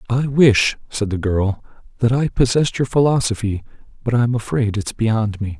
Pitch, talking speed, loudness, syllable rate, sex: 115 Hz, 195 wpm, -18 LUFS, 5.4 syllables/s, male